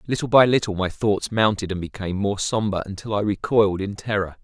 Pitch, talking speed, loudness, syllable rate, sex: 100 Hz, 205 wpm, -22 LUFS, 5.9 syllables/s, male